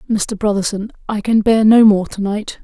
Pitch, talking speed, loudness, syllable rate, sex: 210 Hz, 205 wpm, -15 LUFS, 5.0 syllables/s, female